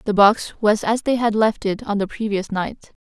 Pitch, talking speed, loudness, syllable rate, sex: 210 Hz, 240 wpm, -20 LUFS, 4.9 syllables/s, female